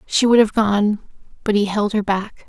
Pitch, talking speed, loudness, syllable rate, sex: 210 Hz, 220 wpm, -18 LUFS, 4.6 syllables/s, female